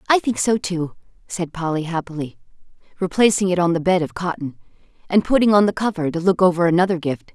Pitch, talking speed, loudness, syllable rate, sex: 175 Hz, 195 wpm, -19 LUFS, 6.1 syllables/s, female